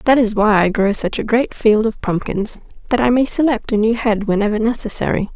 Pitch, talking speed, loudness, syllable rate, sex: 220 Hz, 215 wpm, -17 LUFS, 5.5 syllables/s, female